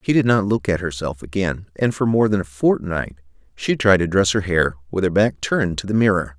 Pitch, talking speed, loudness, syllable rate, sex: 95 Hz, 245 wpm, -19 LUFS, 5.5 syllables/s, male